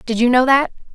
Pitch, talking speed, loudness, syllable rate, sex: 250 Hz, 255 wpm, -15 LUFS, 6.5 syllables/s, female